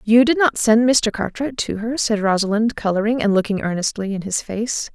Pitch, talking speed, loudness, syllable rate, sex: 220 Hz, 205 wpm, -19 LUFS, 5.2 syllables/s, female